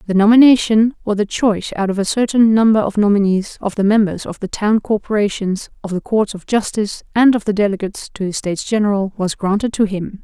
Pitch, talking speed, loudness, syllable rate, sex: 205 Hz, 210 wpm, -16 LUFS, 5.9 syllables/s, female